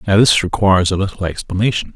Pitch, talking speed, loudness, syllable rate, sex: 95 Hz, 185 wpm, -15 LUFS, 6.7 syllables/s, male